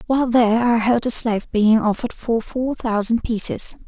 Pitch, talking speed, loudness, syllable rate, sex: 230 Hz, 185 wpm, -19 LUFS, 5.3 syllables/s, female